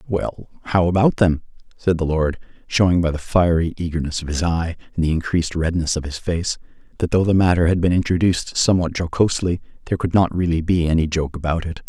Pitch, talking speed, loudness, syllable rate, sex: 85 Hz, 195 wpm, -20 LUFS, 6.1 syllables/s, male